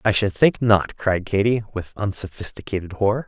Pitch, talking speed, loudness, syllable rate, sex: 105 Hz, 165 wpm, -21 LUFS, 5.3 syllables/s, male